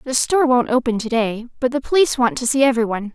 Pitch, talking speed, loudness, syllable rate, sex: 250 Hz, 265 wpm, -18 LUFS, 7.2 syllables/s, female